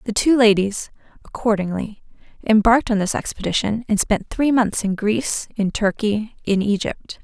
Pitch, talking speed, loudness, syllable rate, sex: 215 Hz, 150 wpm, -20 LUFS, 4.9 syllables/s, female